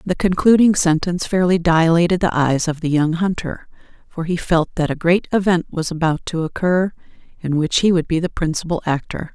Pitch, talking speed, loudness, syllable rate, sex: 170 Hz, 195 wpm, -18 LUFS, 5.3 syllables/s, female